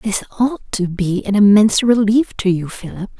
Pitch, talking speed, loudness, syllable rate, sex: 210 Hz, 190 wpm, -15 LUFS, 4.9 syllables/s, female